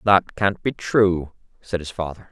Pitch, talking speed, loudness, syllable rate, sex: 90 Hz, 180 wpm, -22 LUFS, 4.2 syllables/s, male